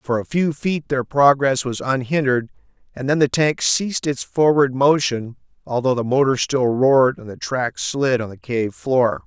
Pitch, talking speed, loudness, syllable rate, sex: 130 Hz, 190 wpm, -19 LUFS, 4.6 syllables/s, male